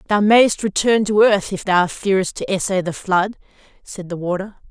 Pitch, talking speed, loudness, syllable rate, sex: 195 Hz, 190 wpm, -18 LUFS, 5.1 syllables/s, female